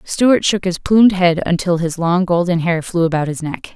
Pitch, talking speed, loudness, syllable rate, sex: 175 Hz, 225 wpm, -16 LUFS, 5.0 syllables/s, female